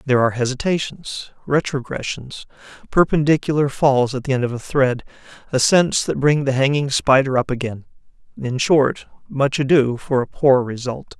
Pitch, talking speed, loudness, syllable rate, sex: 135 Hz, 150 wpm, -19 LUFS, 5.0 syllables/s, male